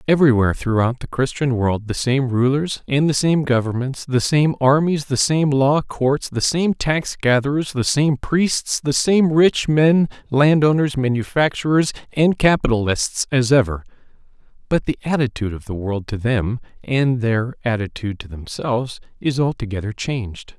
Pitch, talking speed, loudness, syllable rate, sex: 130 Hz, 150 wpm, -19 LUFS, 4.7 syllables/s, male